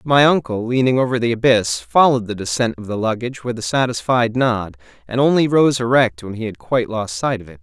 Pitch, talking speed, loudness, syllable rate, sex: 120 Hz, 220 wpm, -18 LUFS, 5.8 syllables/s, male